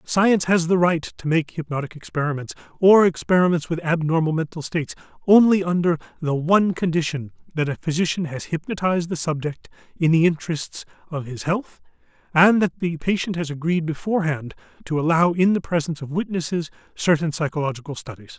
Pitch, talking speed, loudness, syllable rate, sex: 165 Hz, 160 wpm, -21 LUFS, 5.8 syllables/s, male